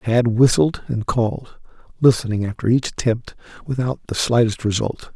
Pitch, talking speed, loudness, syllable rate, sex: 120 Hz, 140 wpm, -19 LUFS, 5.0 syllables/s, male